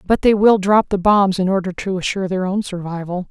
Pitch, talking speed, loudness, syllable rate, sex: 190 Hz, 235 wpm, -17 LUFS, 5.6 syllables/s, female